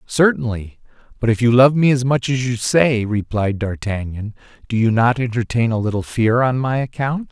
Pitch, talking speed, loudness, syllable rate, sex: 120 Hz, 190 wpm, -18 LUFS, 5.0 syllables/s, male